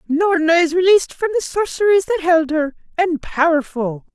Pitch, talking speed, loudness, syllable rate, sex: 325 Hz, 160 wpm, -17 LUFS, 5.3 syllables/s, female